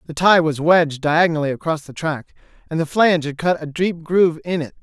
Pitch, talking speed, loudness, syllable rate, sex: 160 Hz, 225 wpm, -18 LUFS, 5.9 syllables/s, male